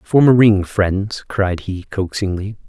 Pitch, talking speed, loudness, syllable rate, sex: 100 Hz, 155 wpm, -17 LUFS, 4.1 syllables/s, male